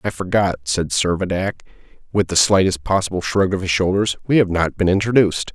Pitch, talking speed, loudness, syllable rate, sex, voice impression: 95 Hz, 185 wpm, -18 LUFS, 5.8 syllables/s, male, masculine, adult-like, thick, tensed, powerful, slightly hard, slightly muffled, cool, intellectual, mature, friendly, wild, lively, slightly intense